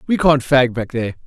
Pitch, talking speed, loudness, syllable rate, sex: 130 Hz, 235 wpm, -17 LUFS, 5.6 syllables/s, male